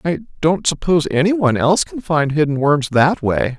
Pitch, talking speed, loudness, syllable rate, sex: 155 Hz, 200 wpm, -16 LUFS, 5.2 syllables/s, male